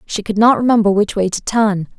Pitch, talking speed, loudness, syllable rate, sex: 210 Hz, 240 wpm, -15 LUFS, 5.6 syllables/s, female